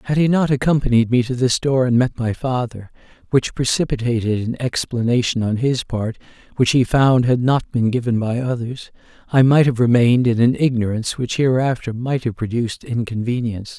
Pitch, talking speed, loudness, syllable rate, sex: 120 Hz, 180 wpm, -18 LUFS, 5.4 syllables/s, male